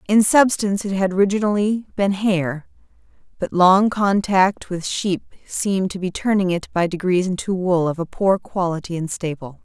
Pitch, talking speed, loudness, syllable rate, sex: 190 Hz, 170 wpm, -20 LUFS, 4.9 syllables/s, female